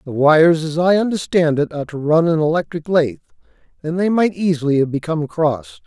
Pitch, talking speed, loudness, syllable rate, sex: 160 Hz, 195 wpm, -17 LUFS, 6.0 syllables/s, male